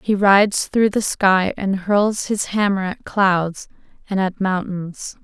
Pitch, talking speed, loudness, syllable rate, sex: 195 Hz, 160 wpm, -18 LUFS, 3.6 syllables/s, female